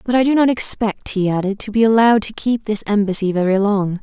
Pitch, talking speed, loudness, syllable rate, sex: 210 Hz, 240 wpm, -17 LUFS, 5.9 syllables/s, female